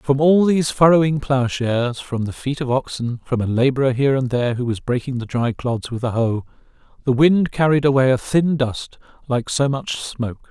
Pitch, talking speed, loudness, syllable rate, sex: 130 Hz, 205 wpm, -19 LUFS, 5.2 syllables/s, male